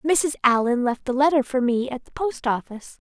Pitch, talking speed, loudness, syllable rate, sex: 260 Hz, 215 wpm, -22 LUFS, 5.2 syllables/s, female